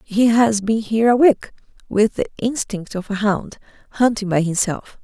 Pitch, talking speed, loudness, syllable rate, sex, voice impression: 215 Hz, 180 wpm, -18 LUFS, 4.7 syllables/s, female, feminine, adult-like, slightly bright, slightly refreshing, friendly, slightly reassuring